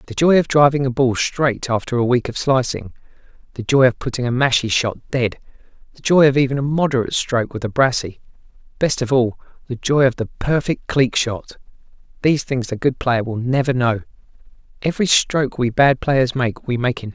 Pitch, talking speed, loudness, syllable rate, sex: 130 Hz, 200 wpm, -18 LUFS, 5.5 syllables/s, male